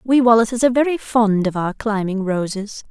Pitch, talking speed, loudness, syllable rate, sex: 220 Hz, 185 wpm, -18 LUFS, 5.4 syllables/s, female